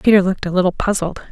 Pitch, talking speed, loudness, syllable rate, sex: 190 Hz, 230 wpm, -17 LUFS, 7.4 syllables/s, female